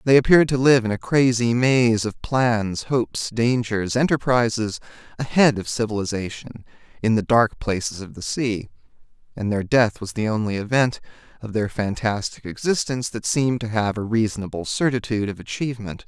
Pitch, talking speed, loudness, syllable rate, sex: 115 Hz, 160 wpm, -21 LUFS, 5.2 syllables/s, male